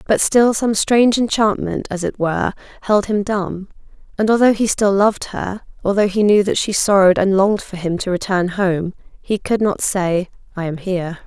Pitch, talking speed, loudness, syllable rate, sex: 200 Hz, 195 wpm, -17 LUFS, 5.1 syllables/s, female